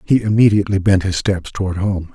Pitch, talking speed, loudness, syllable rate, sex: 100 Hz, 195 wpm, -16 LUFS, 5.9 syllables/s, male